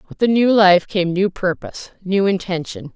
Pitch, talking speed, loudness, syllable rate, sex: 195 Hz, 185 wpm, -17 LUFS, 4.9 syllables/s, female